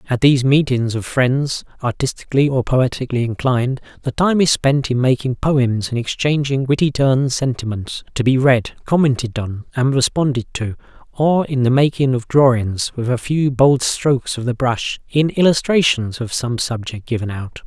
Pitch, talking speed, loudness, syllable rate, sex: 130 Hz, 170 wpm, -17 LUFS, 5.0 syllables/s, male